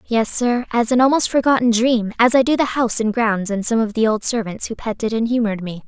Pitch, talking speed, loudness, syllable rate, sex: 230 Hz, 255 wpm, -18 LUFS, 5.9 syllables/s, female